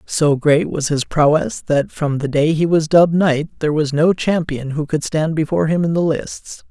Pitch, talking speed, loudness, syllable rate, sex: 155 Hz, 225 wpm, -17 LUFS, 4.7 syllables/s, male